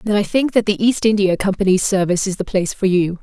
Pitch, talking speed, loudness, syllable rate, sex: 195 Hz, 260 wpm, -17 LUFS, 6.4 syllables/s, female